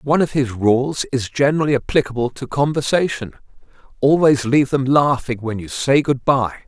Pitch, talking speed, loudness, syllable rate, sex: 130 Hz, 160 wpm, -18 LUFS, 5.4 syllables/s, male